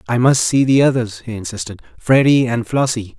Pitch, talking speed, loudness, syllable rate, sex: 120 Hz, 190 wpm, -16 LUFS, 5.4 syllables/s, male